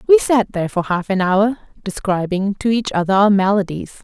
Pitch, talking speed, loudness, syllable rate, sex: 205 Hz, 195 wpm, -17 LUFS, 5.2 syllables/s, female